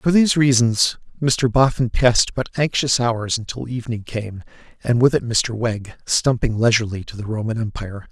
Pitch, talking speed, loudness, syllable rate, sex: 120 Hz, 170 wpm, -19 LUFS, 5.2 syllables/s, male